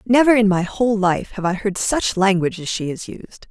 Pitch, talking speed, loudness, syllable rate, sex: 200 Hz, 240 wpm, -18 LUFS, 5.3 syllables/s, female